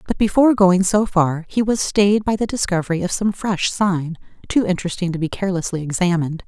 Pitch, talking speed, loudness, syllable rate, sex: 185 Hz, 185 wpm, -19 LUFS, 5.9 syllables/s, female